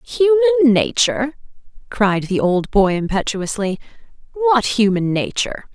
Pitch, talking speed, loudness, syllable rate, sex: 240 Hz, 105 wpm, -17 LUFS, 4.2 syllables/s, female